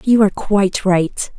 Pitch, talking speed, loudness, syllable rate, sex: 200 Hz, 175 wpm, -16 LUFS, 4.8 syllables/s, female